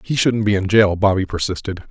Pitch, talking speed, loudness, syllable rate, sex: 100 Hz, 220 wpm, -17 LUFS, 5.8 syllables/s, male